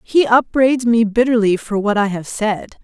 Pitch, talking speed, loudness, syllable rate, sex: 225 Hz, 190 wpm, -16 LUFS, 4.6 syllables/s, female